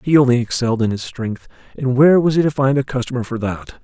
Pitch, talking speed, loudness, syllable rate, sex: 125 Hz, 250 wpm, -17 LUFS, 6.4 syllables/s, male